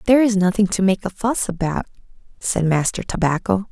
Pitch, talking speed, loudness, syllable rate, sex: 195 Hz, 180 wpm, -20 LUFS, 5.7 syllables/s, female